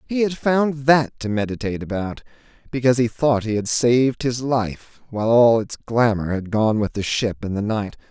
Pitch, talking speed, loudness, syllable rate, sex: 120 Hz, 200 wpm, -20 LUFS, 5.0 syllables/s, male